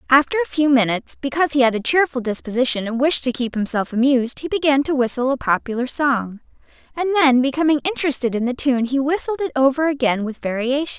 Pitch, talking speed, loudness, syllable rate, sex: 265 Hz, 200 wpm, -19 LUFS, 6.4 syllables/s, female